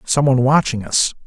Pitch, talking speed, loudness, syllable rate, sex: 130 Hz, 140 wpm, -16 LUFS, 5.7 syllables/s, male